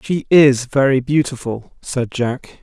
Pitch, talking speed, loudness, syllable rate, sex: 135 Hz, 135 wpm, -16 LUFS, 3.7 syllables/s, male